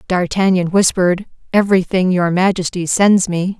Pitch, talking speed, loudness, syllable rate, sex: 185 Hz, 115 wpm, -15 LUFS, 5.0 syllables/s, female